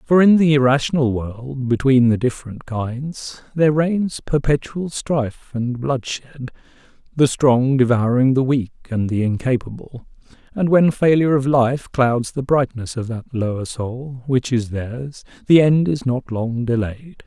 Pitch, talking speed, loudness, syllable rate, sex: 130 Hz, 155 wpm, -19 LUFS, 4.3 syllables/s, male